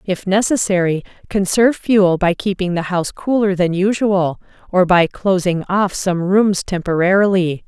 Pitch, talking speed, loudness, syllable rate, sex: 190 Hz, 140 wpm, -16 LUFS, 4.6 syllables/s, female